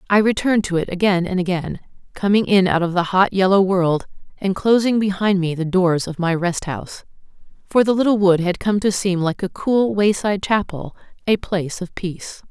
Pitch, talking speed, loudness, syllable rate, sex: 190 Hz, 200 wpm, -19 LUFS, 5.3 syllables/s, female